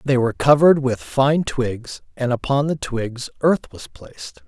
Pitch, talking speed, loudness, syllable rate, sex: 125 Hz, 175 wpm, -19 LUFS, 4.4 syllables/s, male